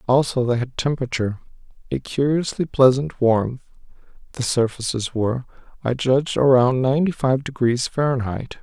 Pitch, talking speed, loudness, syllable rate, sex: 130 Hz, 120 wpm, -21 LUFS, 5.2 syllables/s, male